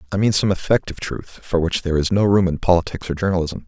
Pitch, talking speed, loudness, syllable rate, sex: 90 Hz, 245 wpm, -19 LUFS, 6.7 syllables/s, male